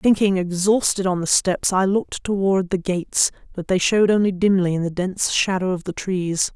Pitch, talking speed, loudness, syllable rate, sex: 190 Hz, 190 wpm, -20 LUFS, 5.3 syllables/s, female